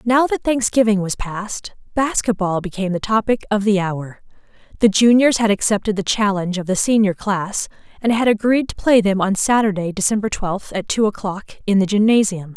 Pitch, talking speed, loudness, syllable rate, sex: 210 Hz, 180 wpm, -18 LUFS, 5.3 syllables/s, female